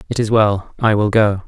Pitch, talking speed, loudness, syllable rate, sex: 105 Hz, 245 wpm, -16 LUFS, 5.3 syllables/s, male